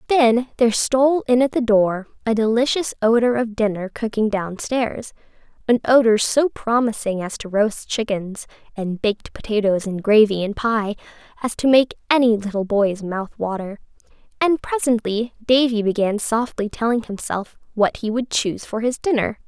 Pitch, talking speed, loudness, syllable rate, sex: 225 Hz, 155 wpm, -20 LUFS, 4.8 syllables/s, female